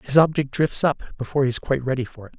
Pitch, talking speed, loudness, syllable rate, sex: 135 Hz, 275 wpm, -21 LUFS, 7.1 syllables/s, male